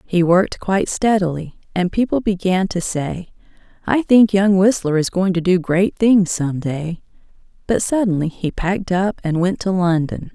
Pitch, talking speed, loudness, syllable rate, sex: 185 Hz, 175 wpm, -18 LUFS, 4.6 syllables/s, female